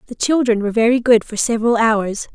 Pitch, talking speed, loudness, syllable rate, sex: 225 Hz, 205 wpm, -16 LUFS, 6.2 syllables/s, female